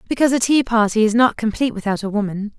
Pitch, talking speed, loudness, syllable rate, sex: 225 Hz, 230 wpm, -18 LUFS, 7.1 syllables/s, female